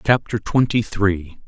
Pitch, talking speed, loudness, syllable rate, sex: 105 Hz, 120 wpm, -20 LUFS, 3.9 syllables/s, male